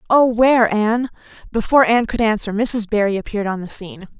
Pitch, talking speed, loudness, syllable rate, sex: 220 Hz, 185 wpm, -17 LUFS, 6.7 syllables/s, female